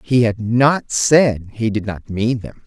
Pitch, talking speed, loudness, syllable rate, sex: 115 Hz, 205 wpm, -17 LUFS, 3.6 syllables/s, male